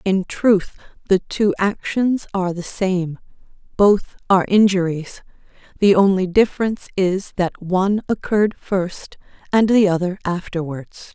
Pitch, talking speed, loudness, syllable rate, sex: 190 Hz, 125 wpm, -19 LUFS, 4.5 syllables/s, female